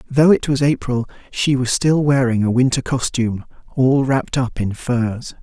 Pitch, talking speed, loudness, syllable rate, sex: 130 Hz, 175 wpm, -18 LUFS, 4.7 syllables/s, male